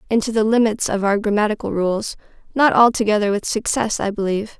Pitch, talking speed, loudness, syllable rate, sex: 215 Hz, 155 wpm, -18 LUFS, 6.0 syllables/s, female